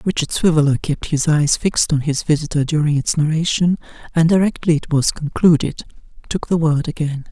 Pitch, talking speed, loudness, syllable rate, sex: 155 Hz, 170 wpm, -17 LUFS, 5.5 syllables/s, male